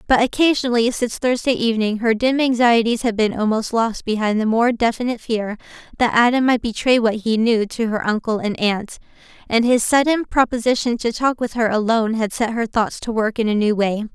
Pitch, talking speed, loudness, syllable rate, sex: 230 Hz, 205 wpm, -18 LUFS, 5.6 syllables/s, female